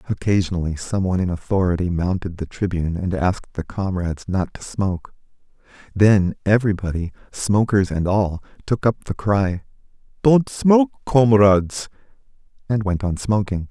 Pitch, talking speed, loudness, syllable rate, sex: 100 Hz, 135 wpm, -20 LUFS, 5.2 syllables/s, male